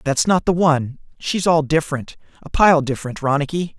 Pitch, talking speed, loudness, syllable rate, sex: 155 Hz, 175 wpm, -18 LUFS, 5.6 syllables/s, male